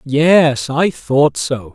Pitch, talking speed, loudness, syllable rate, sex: 140 Hz, 140 wpm, -14 LUFS, 2.4 syllables/s, male